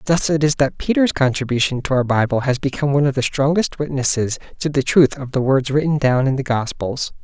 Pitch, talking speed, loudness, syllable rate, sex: 140 Hz, 225 wpm, -18 LUFS, 5.9 syllables/s, male